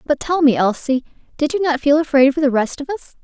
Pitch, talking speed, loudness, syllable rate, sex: 290 Hz, 260 wpm, -17 LUFS, 5.8 syllables/s, female